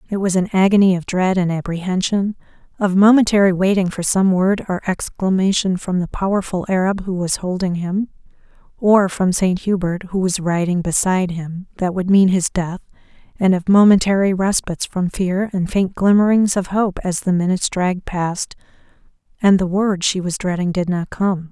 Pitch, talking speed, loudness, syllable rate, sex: 185 Hz, 175 wpm, -17 LUFS, 5.1 syllables/s, female